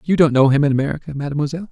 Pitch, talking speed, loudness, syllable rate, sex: 150 Hz, 245 wpm, -17 LUFS, 8.7 syllables/s, male